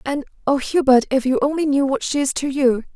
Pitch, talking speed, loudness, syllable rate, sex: 280 Hz, 245 wpm, -19 LUFS, 5.7 syllables/s, female